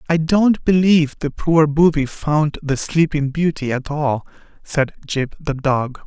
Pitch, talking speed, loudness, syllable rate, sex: 150 Hz, 160 wpm, -18 LUFS, 4.0 syllables/s, male